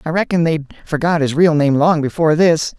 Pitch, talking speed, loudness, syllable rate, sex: 160 Hz, 215 wpm, -15 LUFS, 6.0 syllables/s, male